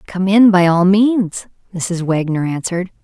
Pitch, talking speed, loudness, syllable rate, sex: 185 Hz, 160 wpm, -15 LUFS, 4.3 syllables/s, female